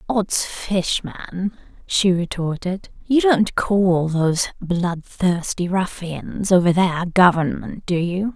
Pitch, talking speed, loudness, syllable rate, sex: 185 Hz, 120 wpm, -20 LUFS, 3.6 syllables/s, female